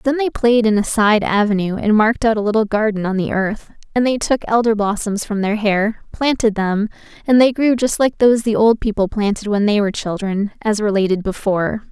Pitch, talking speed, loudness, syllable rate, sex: 215 Hz, 215 wpm, -17 LUFS, 5.5 syllables/s, female